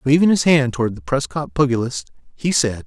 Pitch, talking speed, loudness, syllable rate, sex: 135 Hz, 190 wpm, -18 LUFS, 5.5 syllables/s, male